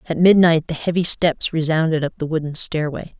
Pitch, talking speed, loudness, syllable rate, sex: 160 Hz, 190 wpm, -18 LUFS, 5.4 syllables/s, female